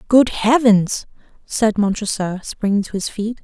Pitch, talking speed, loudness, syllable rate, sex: 215 Hz, 140 wpm, -18 LUFS, 4.2 syllables/s, female